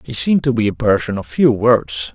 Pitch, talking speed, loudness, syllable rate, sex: 115 Hz, 250 wpm, -16 LUFS, 5.4 syllables/s, male